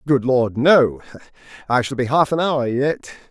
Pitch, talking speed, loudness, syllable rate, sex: 130 Hz, 180 wpm, -18 LUFS, 4.4 syllables/s, male